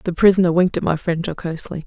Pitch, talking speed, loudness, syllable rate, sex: 170 Hz, 225 wpm, -19 LUFS, 7.4 syllables/s, female